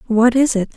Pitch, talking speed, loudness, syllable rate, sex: 235 Hz, 235 wpm, -15 LUFS, 5.4 syllables/s, female